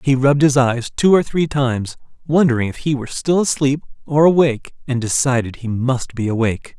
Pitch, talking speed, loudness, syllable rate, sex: 135 Hz, 195 wpm, -17 LUFS, 5.7 syllables/s, male